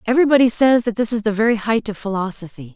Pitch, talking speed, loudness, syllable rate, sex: 220 Hz, 220 wpm, -17 LUFS, 6.8 syllables/s, female